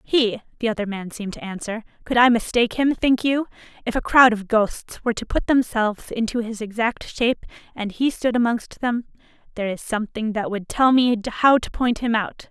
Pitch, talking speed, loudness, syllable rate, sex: 230 Hz, 205 wpm, -21 LUFS, 5.5 syllables/s, female